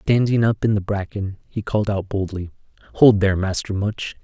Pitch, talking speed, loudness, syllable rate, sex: 100 Hz, 185 wpm, -20 LUFS, 5.3 syllables/s, male